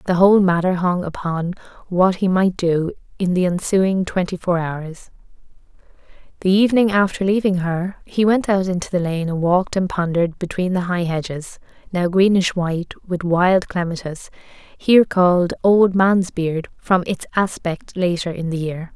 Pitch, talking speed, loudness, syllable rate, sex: 180 Hz, 160 wpm, -19 LUFS, 4.7 syllables/s, female